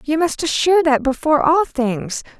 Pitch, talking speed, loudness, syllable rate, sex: 295 Hz, 175 wpm, -17 LUFS, 5.1 syllables/s, female